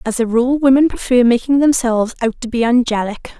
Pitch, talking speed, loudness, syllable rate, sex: 245 Hz, 195 wpm, -15 LUFS, 5.7 syllables/s, female